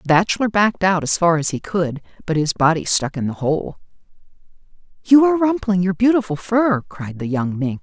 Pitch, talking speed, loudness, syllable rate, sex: 175 Hz, 200 wpm, -18 LUFS, 5.5 syllables/s, female